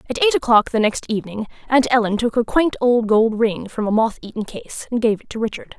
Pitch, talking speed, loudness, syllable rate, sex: 230 Hz, 250 wpm, -19 LUFS, 5.7 syllables/s, female